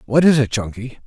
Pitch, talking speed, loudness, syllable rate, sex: 125 Hz, 225 wpm, -16 LUFS, 5.7 syllables/s, male